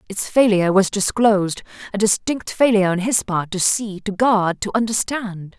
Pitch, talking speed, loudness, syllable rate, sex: 200 Hz, 160 wpm, -18 LUFS, 4.9 syllables/s, female